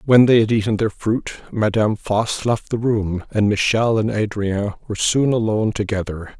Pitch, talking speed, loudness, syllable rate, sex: 110 Hz, 180 wpm, -19 LUFS, 4.9 syllables/s, male